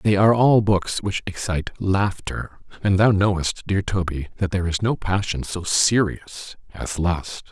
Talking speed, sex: 170 wpm, male